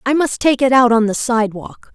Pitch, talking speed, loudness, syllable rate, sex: 245 Hz, 245 wpm, -15 LUFS, 5.5 syllables/s, female